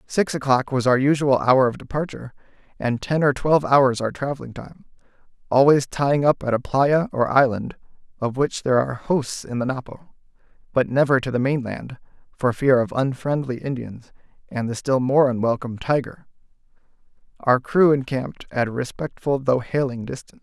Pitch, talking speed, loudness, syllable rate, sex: 130 Hz, 170 wpm, -21 LUFS, 5.4 syllables/s, male